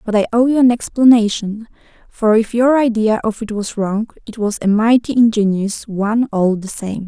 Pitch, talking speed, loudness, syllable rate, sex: 220 Hz, 195 wpm, -15 LUFS, 5.0 syllables/s, female